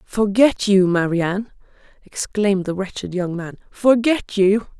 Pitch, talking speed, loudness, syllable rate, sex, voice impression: 200 Hz, 140 wpm, -19 LUFS, 4.5 syllables/s, female, very feminine, very adult-like, intellectual, slightly elegant